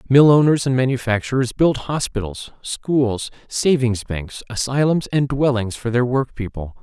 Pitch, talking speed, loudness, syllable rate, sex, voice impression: 125 Hz, 125 wpm, -19 LUFS, 4.4 syllables/s, male, very masculine, adult-like, slightly middle-aged, slightly thick, slightly relaxed, powerful, slightly bright, soft, slightly muffled, fluent, slightly cool, intellectual, slightly refreshing, sincere, calm, slightly mature, friendly, reassuring, slightly unique, slightly elegant, slightly wild, slightly sweet, slightly lively, kind, modest